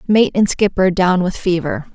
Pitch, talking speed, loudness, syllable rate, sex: 190 Hz, 185 wpm, -16 LUFS, 4.6 syllables/s, female